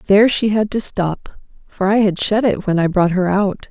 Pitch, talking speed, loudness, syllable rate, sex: 200 Hz, 245 wpm, -16 LUFS, 4.9 syllables/s, female